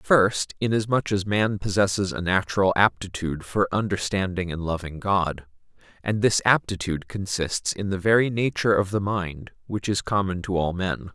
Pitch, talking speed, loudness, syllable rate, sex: 95 Hz, 160 wpm, -24 LUFS, 4.9 syllables/s, male